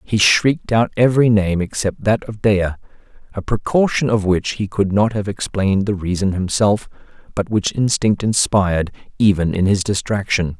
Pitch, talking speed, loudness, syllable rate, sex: 105 Hz, 160 wpm, -17 LUFS, 5.0 syllables/s, male